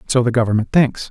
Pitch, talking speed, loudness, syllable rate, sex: 120 Hz, 220 wpm, -16 LUFS, 6.2 syllables/s, male